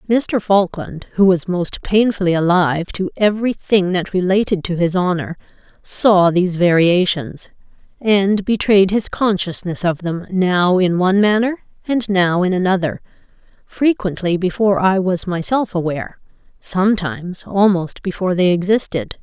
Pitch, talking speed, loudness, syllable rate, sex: 190 Hz, 135 wpm, -17 LUFS, 4.7 syllables/s, female